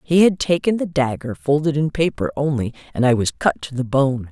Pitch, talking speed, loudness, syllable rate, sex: 135 Hz, 220 wpm, -19 LUFS, 5.3 syllables/s, female